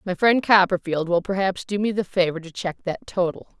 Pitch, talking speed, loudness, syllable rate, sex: 185 Hz, 215 wpm, -22 LUFS, 5.5 syllables/s, female